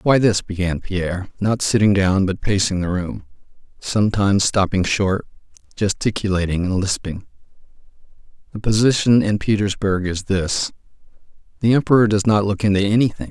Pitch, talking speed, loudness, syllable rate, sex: 100 Hz, 135 wpm, -19 LUFS, 5.3 syllables/s, male